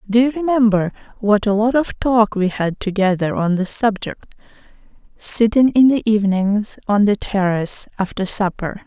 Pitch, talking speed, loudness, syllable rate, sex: 215 Hz, 155 wpm, -17 LUFS, 4.7 syllables/s, female